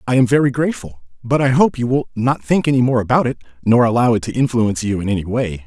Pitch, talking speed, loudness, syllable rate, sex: 120 Hz, 255 wpm, -17 LUFS, 6.5 syllables/s, male